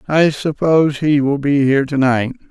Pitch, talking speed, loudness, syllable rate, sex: 140 Hz, 190 wpm, -15 LUFS, 5.0 syllables/s, male